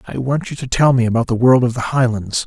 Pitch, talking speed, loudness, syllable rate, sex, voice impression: 125 Hz, 290 wpm, -16 LUFS, 6.1 syllables/s, male, masculine, middle-aged, relaxed, powerful, hard, slightly muffled, raspy, calm, mature, friendly, slightly reassuring, wild, kind, modest